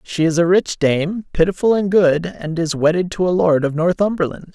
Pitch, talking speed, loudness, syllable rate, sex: 170 Hz, 210 wpm, -17 LUFS, 5.0 syllables/s, male